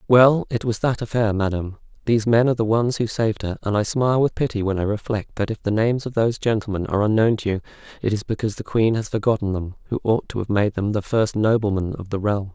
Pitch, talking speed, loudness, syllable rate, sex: 110 Hz, 255 wpm, -21 LUFS, 6.5 syllables/s, male